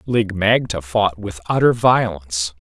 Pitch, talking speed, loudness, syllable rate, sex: 100 Hz, 135 wpm, -18 LUFS, 4.2 syllables/s, male